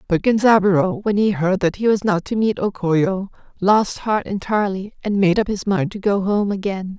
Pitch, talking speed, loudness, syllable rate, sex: 200 Hz, 215 wpm, -19 LUFS, 5.0 syllables/s, female